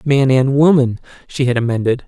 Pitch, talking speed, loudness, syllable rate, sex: 130 Hz, 175 wpm, -15 LUFS, 5.3 syllables/s, male